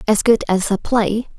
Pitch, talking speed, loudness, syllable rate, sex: 215 Hz, 215 wpm, -17 LUFS, 4.5 syllables/s, female